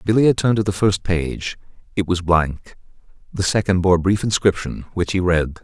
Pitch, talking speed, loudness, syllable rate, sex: 95 Hz, 190 wpm, -19 LUFS, 5.2 syllables/s, male